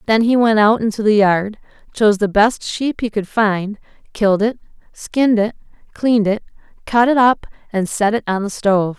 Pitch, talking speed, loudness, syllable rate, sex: 215 Hz, 195 wpm, -16 LUFS, 5.2 syllables/s, female